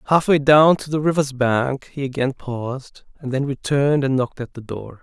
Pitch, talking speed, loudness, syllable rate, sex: 135 Hz, 205 wpm, -19 LUFS, 5.2 syllables/s, male